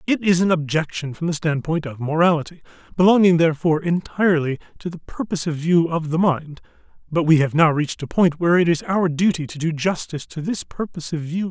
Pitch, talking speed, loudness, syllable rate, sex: 165 Hz, 205 wpm, -20 LUFS, 6.2 syllables/s, male